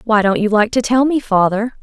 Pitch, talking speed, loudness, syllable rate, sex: 225 Hz, 265 wpm, -15 LUFS, 5.3 syllables/s, female